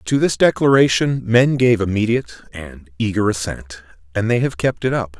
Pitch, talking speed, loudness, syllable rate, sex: 110 Hz, 175 wpm, -17 LUFS, 5.2 syllables/s, male